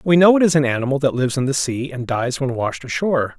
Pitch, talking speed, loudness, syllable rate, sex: 135 Hz, 285 wpm, -18 LUFS, 6.4 syllables/s, male